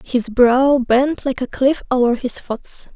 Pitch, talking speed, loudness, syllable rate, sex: 255 Hz, 185 wpm, -17 LUFS, 3.7 syllables/s, female